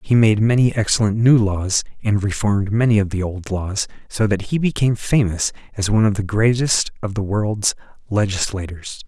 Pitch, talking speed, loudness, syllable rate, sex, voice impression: 105 Hz, 180 wpm, -19 LUFS, 5.2 syllables/s, male, masculine, adult-like, tensed, powerful, bright, slightly soft, fluent, intellectual, calm, mature, friendly, reassuring, wild, slightly lively, slightly kind